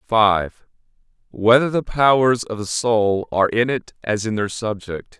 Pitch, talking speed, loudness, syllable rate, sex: 110 Hz, 160 wpm, -19 LUFS, 4.9 syllables/s, male